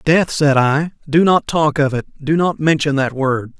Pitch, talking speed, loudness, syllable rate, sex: 150 Hz, 200 wpm, -16 LUFS, 4.2 syllables/s, male